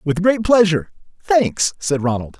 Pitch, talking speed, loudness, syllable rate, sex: 170 Hz, 125 wpm, -17 LUFS, 4.7 syllables/s, male